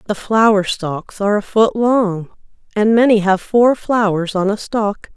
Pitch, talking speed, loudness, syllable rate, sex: 210 Hz, 175 wpm, -16 LUFS, 4.2 syllables/s, female